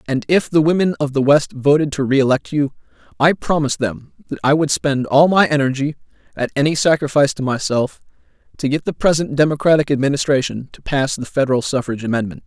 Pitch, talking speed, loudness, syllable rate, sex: 140 Hz, 185 wpm, -17 LUFS, 6.1 syllables/s, male